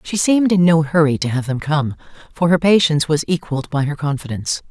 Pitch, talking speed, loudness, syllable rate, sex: 155 Hz, 215 wpm, -17 LUFS, 6.3 syllables/s, female